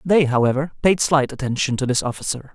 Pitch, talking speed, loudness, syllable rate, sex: 140 Hz, 190 wpm, -20 LUFS, 6.0 syllables/s, male